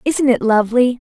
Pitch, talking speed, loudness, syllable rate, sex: 245 Hz, 155 wpm, -15 LUFS, 5.4 syllables/s, female